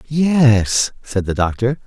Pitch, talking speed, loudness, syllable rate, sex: 125 Hz, 130 wpm, -16 LUFS, 3.2 syllables/s, male